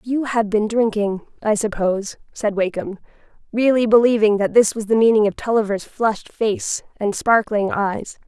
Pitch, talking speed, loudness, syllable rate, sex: 215 Hz, 160 wpm, -19 LUFS, 4.8 syllables/s, female